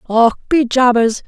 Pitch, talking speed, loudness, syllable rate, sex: 245 Hz, 140 wpm, -14 LUFS, 3.9 syllables/s, female